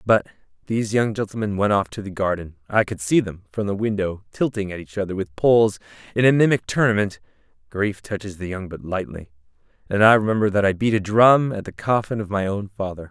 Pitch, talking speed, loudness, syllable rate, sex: 100 Hz, 215 wpm, -21 LUFS, 3.5 syllables/s, male